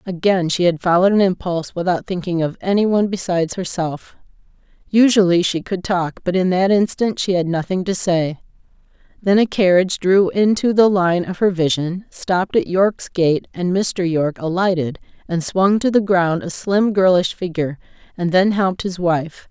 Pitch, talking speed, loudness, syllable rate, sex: 180 Hz, 180 wpm, -18 LUFS, 5.0 syllables/s, female